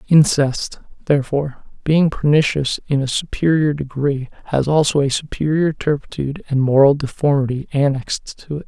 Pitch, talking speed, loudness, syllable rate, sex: 145 Hz, 130 wpm, -18 LUFS, 5.3 syllables/s, male